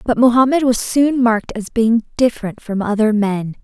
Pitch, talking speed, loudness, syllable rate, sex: 230 Hz, 180 wpm, -16 LUFS, 5.1 syllables/s, female